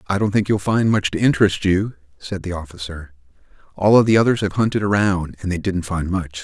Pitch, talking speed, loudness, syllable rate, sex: 95 Hz, 225 wpm, -19 LUFS, 5.7 syllables/s, male